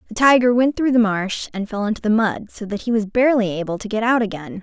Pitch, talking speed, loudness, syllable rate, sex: 220 Hz, 270 wpm, -19 LUFS, 6.2 syllables/s, female